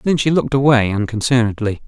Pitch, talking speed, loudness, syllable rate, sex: 120 Hz, 160 wpm, -16 LUFS, 6.4 syllables/s, male